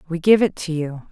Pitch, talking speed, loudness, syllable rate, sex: 170 Hz, 270 wpm, -19 LUFS, 5.6 syllables/s, female